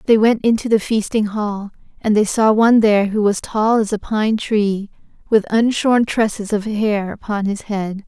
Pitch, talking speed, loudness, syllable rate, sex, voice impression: 215 Hz, 195 wpm, -17 LUFS, 4.6 syllables/s, female, very feminine, slightly young, slightly adult-like, thin, slightly relaxed, weak, slightly dark, soft, clear, fluent, very cute, intellectual, very refreshing, very sincere, very calm, very friendly, reassuring, unique, elegant, wild, very sweet, very kind, very modest, light